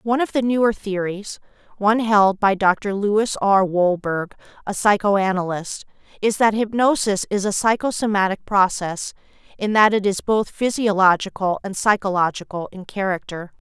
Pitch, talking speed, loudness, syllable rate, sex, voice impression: 200 Hz, 125 wpm, -20 LUFS, 4.8 syllables/s, female, feminine, adult-like, tensed, bright, clear, fluent, intellectual, calm, slightly friendly, slightly strict, slightly sharp, light